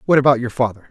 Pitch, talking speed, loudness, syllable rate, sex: 125 Hz, 265 wpm, -17 LUFS, 7.8 syllables/s, male